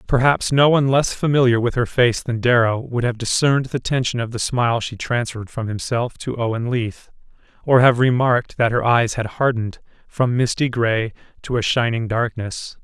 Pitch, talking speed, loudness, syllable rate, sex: 120 Hz, 185 wpm, -19 LUFS, 5.2 syllables/s, male